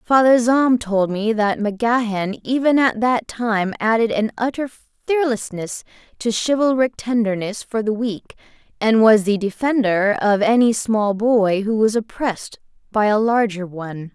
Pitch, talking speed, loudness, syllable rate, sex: 220 Hz, 150 wpm, -19 LUFS, 4.4 syllables/s, female